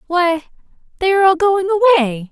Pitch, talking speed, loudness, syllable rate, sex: 350 Hz, 155 wpm, -15 LUFS, 6.0 syllables/s, female